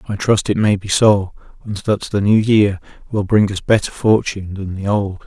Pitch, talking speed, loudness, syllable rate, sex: 100 Hz, 215 wpm, -16 LUFS, 4.8 syllables/s, male